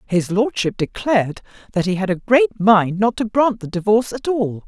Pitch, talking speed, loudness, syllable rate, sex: 210 Hz, 205 wpm, -18 LUFS, 5.0 syllables/s, female